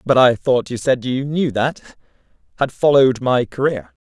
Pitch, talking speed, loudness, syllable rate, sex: 125 Hz, 165 wpm, -17 LUFS, 4.6 syllables/s, male